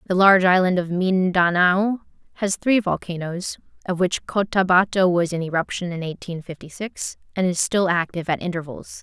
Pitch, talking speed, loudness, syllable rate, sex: 180 Hz, 160 wpm, -21 LUFS, 5.1 syllables/s, female